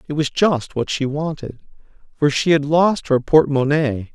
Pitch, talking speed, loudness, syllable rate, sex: 145 Hz, 190 wpm, -18 LUFS, 4.6 syllables/s, male